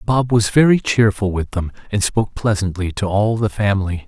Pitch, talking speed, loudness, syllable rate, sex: 105 Hz, 190 wpm, -18 LUFS, 5.3 syllables/s, male